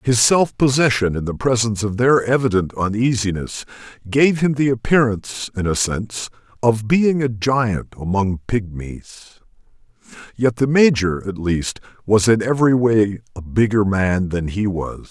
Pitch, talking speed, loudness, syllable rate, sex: 110 Hz, 150 wpm, -18 LUFS, 4.5 syllables/s, male